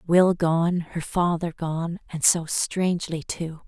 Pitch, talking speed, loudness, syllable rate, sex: 170 Hz, 130 wpm, -24 LUFS, 3.6 syllables/s, female